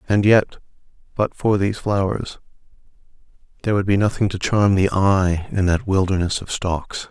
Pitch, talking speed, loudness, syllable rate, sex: 100 Hz, 160 wpm, -19 LUFS, 4.9 syllables/s, male